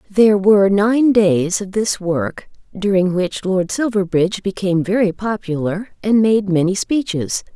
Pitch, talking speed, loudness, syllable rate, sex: 195 Hz, 145 wpm, -17 LUFS, 4.5 syllables/s, female